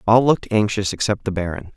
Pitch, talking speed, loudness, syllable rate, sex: 105 Hz, 205 wpm, -20 LUFS, 6.2 syllables/s, male